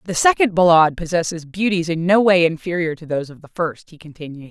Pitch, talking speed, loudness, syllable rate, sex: 170 Hz, 215 wpm, -18 LUFS, 6.2 syllables/s, female